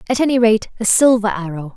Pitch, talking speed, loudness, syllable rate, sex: 220 Hz, 205 wpm, -15 LUFS, 6.0 syllables/s, female